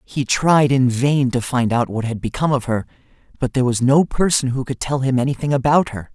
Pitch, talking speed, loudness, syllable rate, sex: 130 Hz, 235 wpm, -18 LUFS, 5.6 syllables/s, male